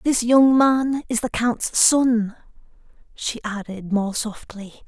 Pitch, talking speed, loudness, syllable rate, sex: 235 Hz, 135 wpm, -20 LUFS, 3.4 syllables/s, female